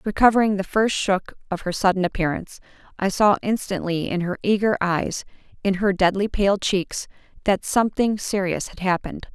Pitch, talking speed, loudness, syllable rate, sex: 195 Hz, 160 wpm, -22 LUFS, 5.3 syllables/s, female